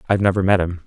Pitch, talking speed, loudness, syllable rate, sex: 95 Hz, 275 wpm, -18 LUFS, 8.7 syllables/s, male